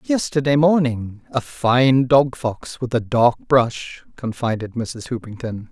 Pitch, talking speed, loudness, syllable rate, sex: 125 Hz, 135 wpm, -19 LUFS, 3.7 syllables/s, male